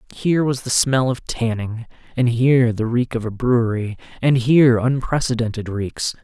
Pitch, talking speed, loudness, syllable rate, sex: 120 Hz, 165 wpm, -19 LUFS, 5.0 syllables/s, male